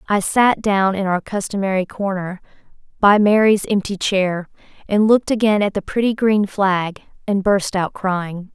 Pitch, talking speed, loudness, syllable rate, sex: 200 Hz, 160 wpm, -18 LUFS, 4.4 syllables/s, female